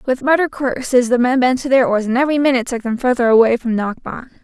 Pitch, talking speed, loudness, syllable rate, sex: 250 Hz, 245 wpm, -16 LUFS, 6.7 syllables/s, female